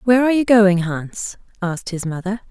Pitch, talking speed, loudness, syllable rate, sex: 200 Hz, 190 wpm, -18 LUFS, 5.7 syllables/s, female